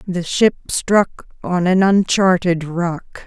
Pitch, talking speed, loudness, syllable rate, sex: 180 Hz, 130 wpm, -17 LUFS, 3.4 syllables/s, female